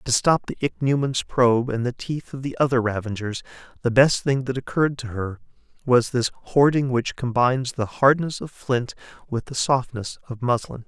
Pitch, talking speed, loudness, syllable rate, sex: 125 Hz, 180 wpm, -22 LUFS, 5.0 syllables/s, male